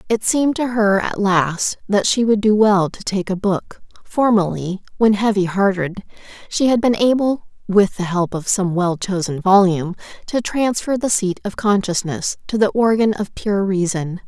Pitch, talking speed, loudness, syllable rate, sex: 200 Hz, 180 wpm, -18 LUFS, 4.6 syllables/s, female